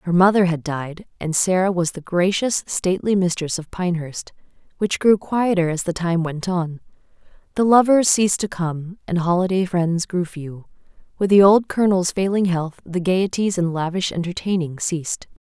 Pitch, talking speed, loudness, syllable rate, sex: 180 Hz, 165 wpm, -20 LUFS, 4.9 syllables/s, female